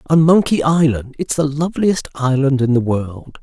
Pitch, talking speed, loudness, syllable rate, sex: 145 Hz, 175 wpm, -16 LUFS, 4.7 syllables/s, male